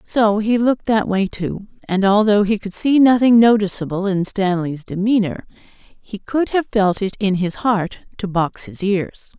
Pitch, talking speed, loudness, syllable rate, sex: 205 Hz, 180 wpm, -18 LUFS, 4.3 syllables/s, female